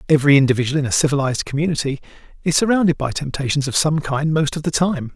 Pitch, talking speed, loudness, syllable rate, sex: 145 Hz, 200 wpm, -18 LUFS, 7.0 syllables/s, male